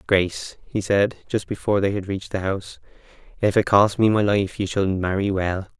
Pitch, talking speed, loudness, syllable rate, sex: 100 Hz, 205 wpm, -22 LUFS, 5.3 syllables/s, male